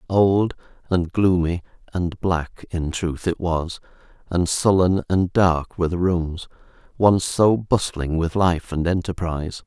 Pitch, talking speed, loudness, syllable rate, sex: 90 Hz, 145 wpm, -21 LUFS, 3.9 syllables/s, male